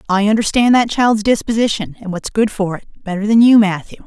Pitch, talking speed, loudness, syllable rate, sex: 210 Hz, 205 wpm, -15 LUFS, 5.7 syllables/s, female